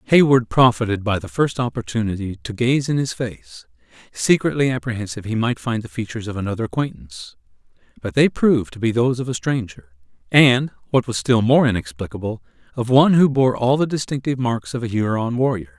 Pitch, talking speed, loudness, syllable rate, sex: 120 Hz, 180 wpm, -19 LUFS, 5.9 syllables/s, male